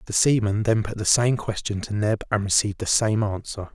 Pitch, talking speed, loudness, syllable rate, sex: 105 Hz, 225 wpm, -22 LUFS, 5.4 syllables/s, male